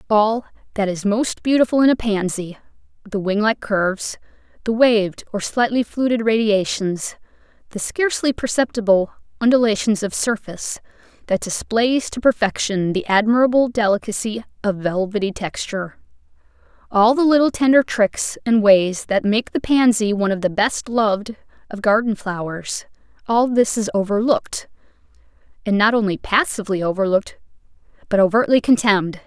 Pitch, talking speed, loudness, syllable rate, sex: 215 Hz, 135 wpm, -19 LUFS, 5.2 syllables/s, female